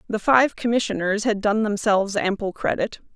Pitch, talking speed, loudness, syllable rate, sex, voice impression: 210 Hz, 150 wpm, -21 LUFS, 5.2 syllables/s, female, slightly feminine, adult-like, fluent, slightly unique